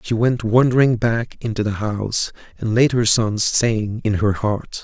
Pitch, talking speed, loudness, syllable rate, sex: 110 Hz, 185 wpm, -19 LUFS, 4.3 syllables/s, male